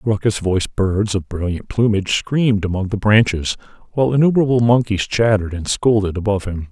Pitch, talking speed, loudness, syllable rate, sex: 105 Hz, 160 wpm, -17 LUFS, 5.9 syllables/s, male